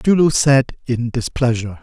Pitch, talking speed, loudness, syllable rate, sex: 125 Hz, 165 wpm, -17 LUFS, 4.8 syllables/s, male